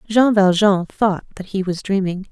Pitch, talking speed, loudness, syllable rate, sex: 195 Hz, 180 wpm, -18 LUFS, 4.4 syllables/s, female